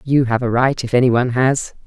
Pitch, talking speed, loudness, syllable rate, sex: 125 Hz, 260 wpm, -16 LUFS, 6.0 syllables/s, female